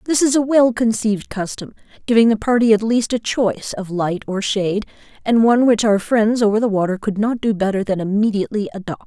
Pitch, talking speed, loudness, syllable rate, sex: 215 Hz, 210 wpm, -17 LUFS, 5.9 syllables/s, female